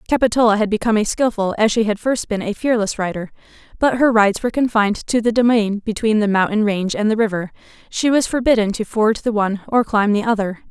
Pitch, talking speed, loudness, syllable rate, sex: 215 Hz, 220 wpm, -18 LUFS, 6.3 syllables/s, female